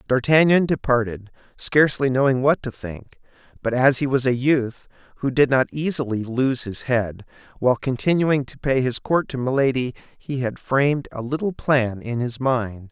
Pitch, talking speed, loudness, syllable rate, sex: 130 Hz, 170 wpm, -21 LUFS, 4.7 syllables/s, male